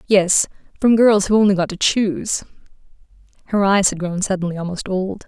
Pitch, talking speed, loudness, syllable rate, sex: 195 Hz, 170 wpm, -18 LUFS, 5.6 syllables/s, female